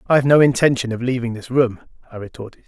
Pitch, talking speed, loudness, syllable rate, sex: 125 Hz, 225 wpm, -17 LUFS, 6.7 syllables/s, male